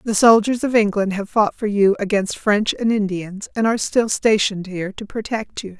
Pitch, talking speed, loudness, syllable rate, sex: 210 Hz, 205 wpm, -19 LUFS, 5.2 syllables/s, female